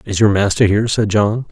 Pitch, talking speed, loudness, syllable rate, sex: 105 Hz, 240 wpm, -15 LUFS, 5.8 syllables/s, male